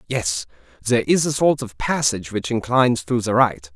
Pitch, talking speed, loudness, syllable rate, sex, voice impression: 115 Hz, 190 wpm, -20 LUFS, 5.5 syllables/s, male, masculine, adult-like, slightly clear, fluent, slightly cool, slightly intellectual, refreshing